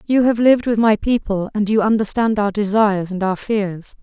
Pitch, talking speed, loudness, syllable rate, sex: 210 Hz, 210 wpm, -17 LUFS, 5.2 syllables/s, female